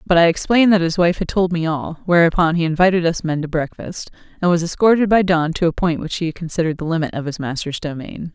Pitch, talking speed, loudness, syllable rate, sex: 170 Hz, 245 wpm, -18 LUFS, 6.2 syllables/s, female